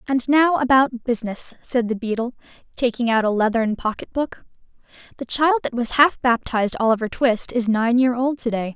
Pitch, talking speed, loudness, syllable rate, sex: 240 Hz, 185 wpm, -20 LUFS, 5.2 syllables/s, female